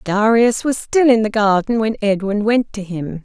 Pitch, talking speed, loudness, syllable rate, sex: 215 Hz, 205 wpm, -16 LUFS, 4.6 syllables/s, female